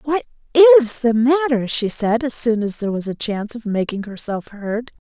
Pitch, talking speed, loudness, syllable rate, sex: 235 Hz, 200 wpm, -18 LUFS, 5.3 syllables/s, female